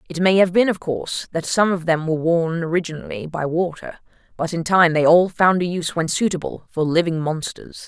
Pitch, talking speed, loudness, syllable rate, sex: 170 Hz, 215 wpm, -20 LUFS, 5.6 syllables/s, female